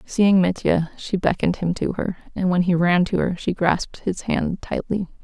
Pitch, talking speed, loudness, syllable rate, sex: 185 Hz, 205 wpm, -21 LUFS, 4.8 syllables/s, female